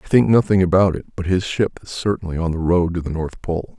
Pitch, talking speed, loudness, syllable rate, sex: 90 Hz, 270 wpm, -19 LUFS, 6.0 syllables/s, male